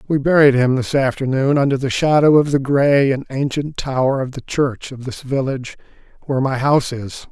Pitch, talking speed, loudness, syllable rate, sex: 135 Hz, 195 wpm, -17 LUFS, 5.3 syllables/s, male